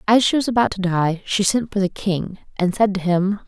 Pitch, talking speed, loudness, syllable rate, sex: 195 Hz, 260 wpm, -20 LUFS, 5.2 syllables/s, female